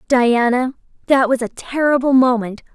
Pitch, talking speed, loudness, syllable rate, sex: 250 Hz, 130 wpm, -16 LUFS, 4.7 syllables/s, female